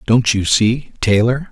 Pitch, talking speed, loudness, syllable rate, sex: 115 Hz, 160 wpm, -15 LUFS, 3.8 syllables/s, male